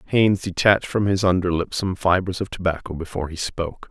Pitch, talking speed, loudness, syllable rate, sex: 90 Hz, 185 wpm, -22 LUFS, 6.1 syllables/s, male